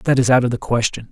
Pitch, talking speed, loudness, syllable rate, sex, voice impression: 120 Hz, 325 wpm, -17 LUFS, 6.5 syllables/s, male, very masculine, very adult-like, very middle-aged, thick, slightly relaxed, slightly powerful, slightly bright, slightly soft, slightly muffled, fluent, slightly raspy, cool, intellectual, very refreshing, sincere, very calm, very friendly, very reassuring, slightly unique, elegant, slightly wild, sweet, very lively, kind, slightly intense